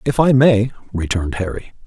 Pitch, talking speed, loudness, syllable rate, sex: 110 Hz, 160 wpm, -17 LUFS, 5.6 syllables/s, male